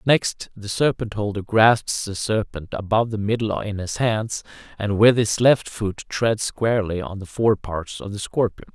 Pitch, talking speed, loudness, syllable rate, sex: 105 Hz, 180 wpm, -22 LUFS, 4.4 syllables/s, male